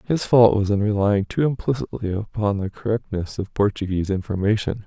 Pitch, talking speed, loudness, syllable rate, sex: 105 Hz, 160 wpm, -21 LUFS, 5.5 syllables/s, male